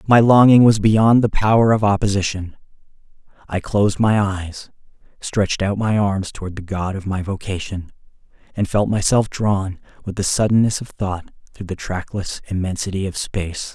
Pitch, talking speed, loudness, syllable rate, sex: 100 Hz, 160 wpm, -18 LUFS, 5.0 syllables/s, male